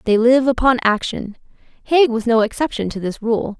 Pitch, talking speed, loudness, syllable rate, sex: 235 Hz, 185 wpm, -17 LUFS, 5.0 syllables/s, female